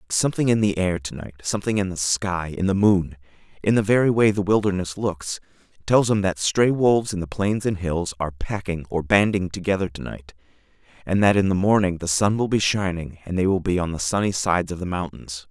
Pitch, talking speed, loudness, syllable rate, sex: 95 Hz, 215 wpm, -22 LUFS, 5.7 syllables/s, male